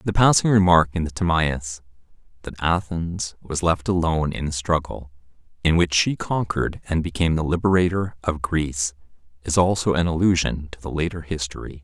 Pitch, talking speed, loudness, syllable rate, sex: 85 Hz, 160 wpm, -22 LUFS, 5.4 syllables/s, male